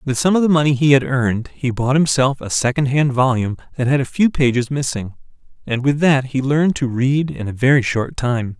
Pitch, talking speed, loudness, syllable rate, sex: 130 Hz, 225 wpm, -17 LUFS, 5.5 syllables/s, male